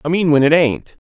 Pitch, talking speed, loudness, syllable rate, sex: 155 Hz, 280 wpm, -14 LUFS, 5.5 syllables/s, male